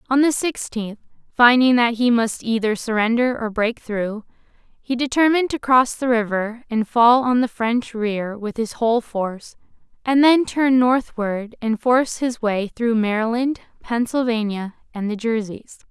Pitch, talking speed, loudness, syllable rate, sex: 235 Hz, 160 wpm, -20 LUFS, 4.5 syllables/s, female